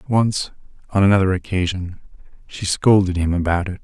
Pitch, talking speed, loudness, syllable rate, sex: 95 Hz, 110 wpm, -19 LUFS, 5.3 syllables/s, male